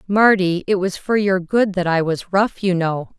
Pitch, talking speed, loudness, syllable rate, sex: 190 Hz, 225 wpm, -18 LUFS, 4.4 syllables/s, female